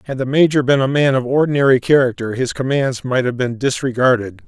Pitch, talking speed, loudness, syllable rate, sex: 130 Hz, 200 wpm, -16 LUFS, 5.8 syllables/s, male